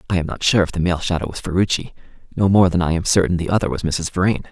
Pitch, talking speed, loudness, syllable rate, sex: 90 Hz, 280 wpm, -19 LUFS, 6.8 syllables/s, male